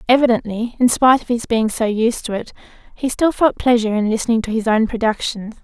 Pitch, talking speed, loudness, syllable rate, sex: 230 Hz, 215 wpm, -17 LUFS, 6.0 syllables/s, female